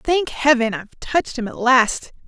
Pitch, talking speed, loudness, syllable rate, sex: 255 Hz, 185 wpm, -18 LUFS, 5.2 syllables/s, female